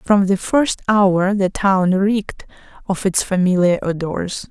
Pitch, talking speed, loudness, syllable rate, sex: 190 Hz, 145 wpm, -17 LUFS, 3.9 syllables/s, female